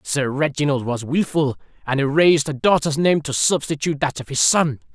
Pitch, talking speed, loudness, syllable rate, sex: 145 Hz, 180 wpm, -19 LUFS, 5.4 syllables/s, male